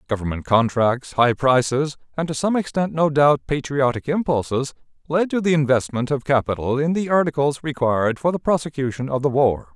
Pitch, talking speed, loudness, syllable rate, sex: 140 Hz, 170 wpm, -20 LUFS, 5.4 syllables/s, male